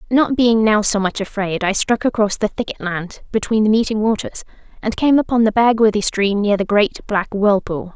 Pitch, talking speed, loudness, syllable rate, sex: 215 Hz, 205 wpm, -17 LUFS, 5.1 syllables/s, female